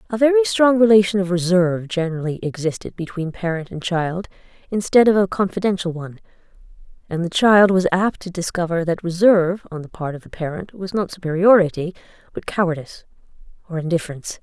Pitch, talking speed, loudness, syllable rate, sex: 180 Hz, 160 wpm, -19 LUFS, 6.1 syllables/s, female